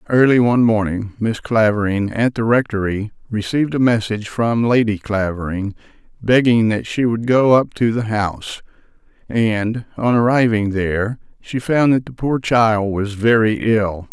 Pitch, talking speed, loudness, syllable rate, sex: 110 Hz, 155 wpm, -17 LUFS, 4.6 syllables/s, male